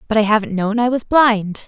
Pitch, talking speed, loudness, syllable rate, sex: 220 Hz, 250 wpm, -16 LUFS, 5.4 syllables/s, female